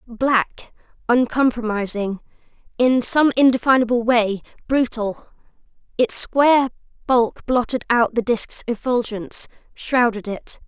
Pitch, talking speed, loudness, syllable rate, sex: 240 Hz, 95 wpm, -19 LUFS, 4.1 syllables/s, female